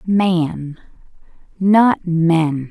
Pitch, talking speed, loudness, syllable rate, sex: 175 Hz, 65 wpm, -16 LUFS, 1.7 syllables/s, female